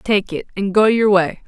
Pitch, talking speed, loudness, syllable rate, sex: 200 Hz, 245 wpm, -16 LUFS, 4.6 syllables/s, female